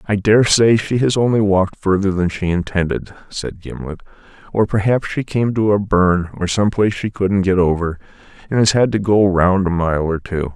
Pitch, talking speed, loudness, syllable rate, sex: 95 Hz, 205 wpm, -17 LUFS, 5.1 syllables/s, male